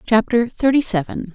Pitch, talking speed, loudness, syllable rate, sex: 225 Hz, 135 wpm, -18 LUFS, 4.9 syllables/s, female